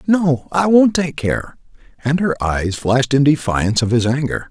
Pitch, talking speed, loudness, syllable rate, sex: 140 Hz, 185 wpm, -17 LUFS, 4.7 syllables/s, male